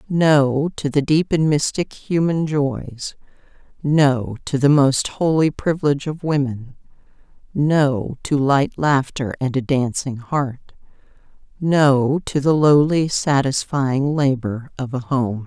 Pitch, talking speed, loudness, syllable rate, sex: 140 Hz, 130 wpm, -19 LUFS, 3.7 syllables/s, female